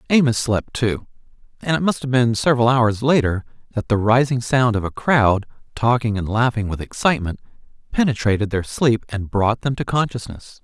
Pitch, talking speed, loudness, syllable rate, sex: 120 Hz, 175 wpm, -19 LUFS, 5.2 syllables/s, male